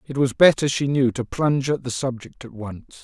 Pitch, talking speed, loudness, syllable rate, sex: 130 Hz, 235 wpm, -20 LUFS, 5.2 syllables/s, male